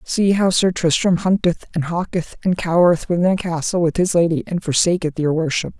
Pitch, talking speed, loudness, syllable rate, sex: 175 Hz, 195 wpm, -18 LUFS, 5.6 syllables/s, female